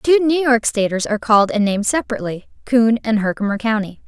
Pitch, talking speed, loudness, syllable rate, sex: 225 Hz, 190 wpm, -17 LUFS, 6.3 syllables/s, female